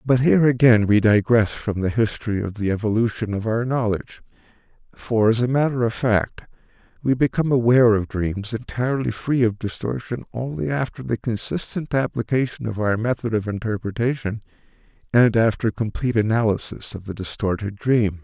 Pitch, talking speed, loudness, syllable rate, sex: 115 Hz, 155 wpm, -21 LUFS, 5.4 syllables/s, male